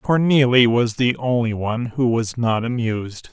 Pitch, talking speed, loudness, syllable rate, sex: 120 Hz, 165 wpm, -19 LUFS, 4.6 syllables/s, male